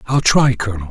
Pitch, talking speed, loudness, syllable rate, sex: 115 Hz, 200 wpm, -15 LUFS, 6.3 syllables/s, male